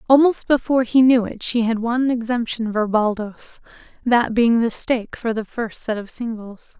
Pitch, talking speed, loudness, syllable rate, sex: 230 Hz, 185 wpm, -20 LUFS, 4.7 syllables/s, female